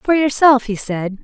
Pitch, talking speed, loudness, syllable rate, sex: 245 Hz, 195 wpm, -15 LUFS, 4.2 syllables/s, female